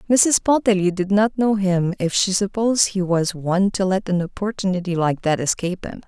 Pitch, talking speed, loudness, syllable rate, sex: 190 Hz, 195 wpm, -20 LUFS, 5.4 syllables/s, female